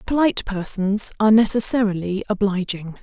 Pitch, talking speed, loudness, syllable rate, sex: 205 Hz, 100 wpm, -19 LUFS, 5.5 syllables/s, female